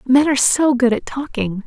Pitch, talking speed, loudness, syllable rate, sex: 260 Hz, 215 wpm, -16 LUFS, 5.1 syllables/s, female